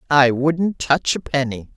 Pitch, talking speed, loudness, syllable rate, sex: 140 Hz, 170 wpm, -19 LUFS, 3.9 syllables/s, female